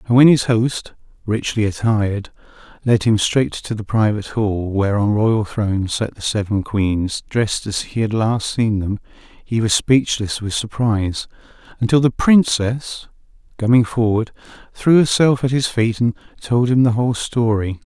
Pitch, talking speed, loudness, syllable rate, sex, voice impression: 110 Hz, 165 wpm, -18 LUFS, 4.6 syllables/s, male, masculine, middle-aged, slightly relaxed, slightly powerful, hard, slightly muffled, slightly raspy, slightly intellectual, calm, mature, slightly friendly, reassuring, wild, slightly lively, slightly strict